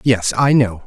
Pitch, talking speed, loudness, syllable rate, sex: 110 Hz, 205 wpm, -15 LUFS, 4.1 syllables/s, male